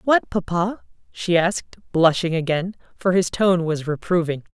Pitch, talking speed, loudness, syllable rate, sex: 175 Hz, 145 wpm, -21 LUFS, 4.5 syllables/s, female